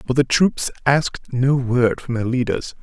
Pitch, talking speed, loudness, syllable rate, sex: 125 Hz, 190 wpm, -19 LUFS, 4.4 syllables/s, male